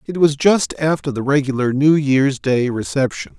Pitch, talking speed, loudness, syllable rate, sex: 140 Hz, 175 wpm, -17 LUFS, 4.6 syllables/s, male